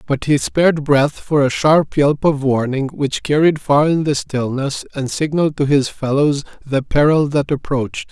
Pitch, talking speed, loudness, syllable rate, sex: 145 Hz, 185 wpm, -16 LUFS, 4.6 syllables/s, male